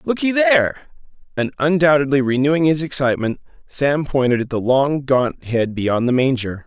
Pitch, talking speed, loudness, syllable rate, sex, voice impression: 140 Hz, 155 wpm, -18 LUFS, 5.0 syllables/s, male, masculine, middle-aged, tensed, powerful, slightly bright, slightly clear, raspy, mature, slightly friendly, wild, lively, intense